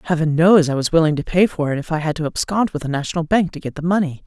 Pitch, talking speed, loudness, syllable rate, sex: 165 Hz, 310 wpm, -18 LUFS, 6.9 syllables/s, female